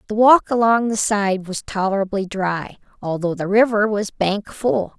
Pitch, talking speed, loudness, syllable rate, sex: 200 Hz, 170 wpm, -19 LUFS, 4.4 syllables/s, female